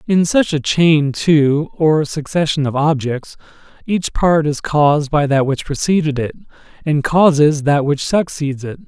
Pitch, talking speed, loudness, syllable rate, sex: 150 Hz, 160 wpm, -16 LUFS, 4.2 syllables/s, male